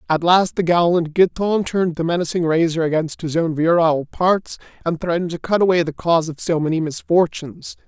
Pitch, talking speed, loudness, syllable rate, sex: 165 Hz, 190 wpm, -18 LUFS, 5.8 syllables/s, male